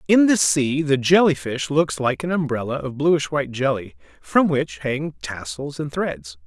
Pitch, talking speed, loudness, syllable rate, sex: 135 Hz, 185 wpm, -21 LUFS, 4.4 syllables/s, male